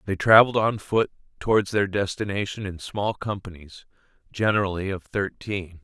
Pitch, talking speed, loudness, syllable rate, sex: 100 Hz, 135 wpm, -23 LUFS, 5.1 syllables/s, male